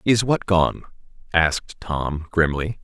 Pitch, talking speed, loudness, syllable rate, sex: 90 Hz, 125 wpm, -21 LUFS, 3.7 syllables/s, male